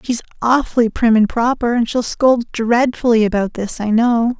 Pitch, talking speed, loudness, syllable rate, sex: 235 Hz, 175 wpm, -16 LUFS, 4.7 syllables/s, female